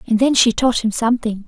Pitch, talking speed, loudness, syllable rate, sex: 230 Hz, 245 wpm, -16 LUFS, 5.9 syllables/s, female